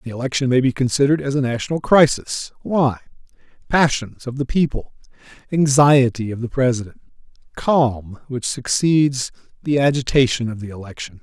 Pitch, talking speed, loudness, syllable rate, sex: 130 Hz, 120 wpm, -19 LUFS, 5.2 syllables/s, male